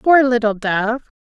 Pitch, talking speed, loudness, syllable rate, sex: 235 Hz, 145 wpm, -17 LUFS, 3.7 syllables/s, female